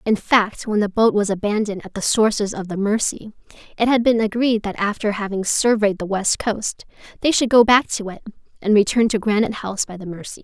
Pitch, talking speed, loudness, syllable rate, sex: 210 Hz, 220 wpm, -19 LUFS, 5.7 syllables/s, female